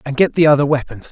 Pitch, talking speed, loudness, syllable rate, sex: 145 Hz, 270 wpm, -15 LUFS, 6.9 syllables/s, male